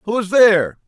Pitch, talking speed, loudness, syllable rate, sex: 195 Hz, 205 wpm, -14 LUFS, 6.0 syllables/s, male